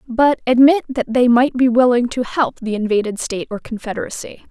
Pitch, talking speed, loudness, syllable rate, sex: 245 Hz, 185 wpm, -17 LUFS, 5.5 syllables/s, female